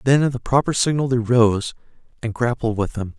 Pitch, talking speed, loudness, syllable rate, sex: 120 Hz, 205 wpm, -20 LUFS, 5.4 syllables/s, male